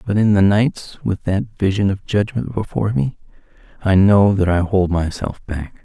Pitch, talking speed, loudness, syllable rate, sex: 100 Hz, 185 wpm, -18 LUFS, 4.8 syllables/s, male